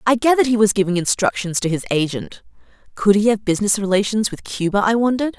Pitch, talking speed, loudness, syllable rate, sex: 210 Hz, 200 wpm, -18 LUFS, 6.7 syllables/s, female